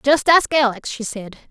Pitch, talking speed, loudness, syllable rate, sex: 260 Hz, 200 wpm, -17 LUFS, 4.7 syllables/s, female